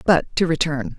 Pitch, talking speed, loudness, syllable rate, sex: 160 Hz, 180 wpm, -20 LUFS, 4.6 syllables/s, female